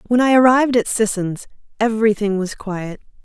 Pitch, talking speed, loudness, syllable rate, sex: 215 Hz, 150 wpm, -17 LUFS, 5.5 syllables/s, female